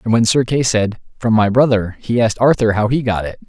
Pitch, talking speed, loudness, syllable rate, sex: 115 Hz, 260 wpm, -16 LUFS, 5.8 syllables/s, male